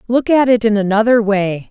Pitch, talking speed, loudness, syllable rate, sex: 220 Hz, 210 wpm, -14 LUFS, 5.2 syllables/s, female